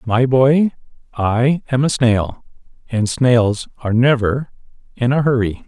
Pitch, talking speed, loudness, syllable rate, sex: 125 Hz, 140 wpm, -17 LUFS, 4.0 syllables/s, male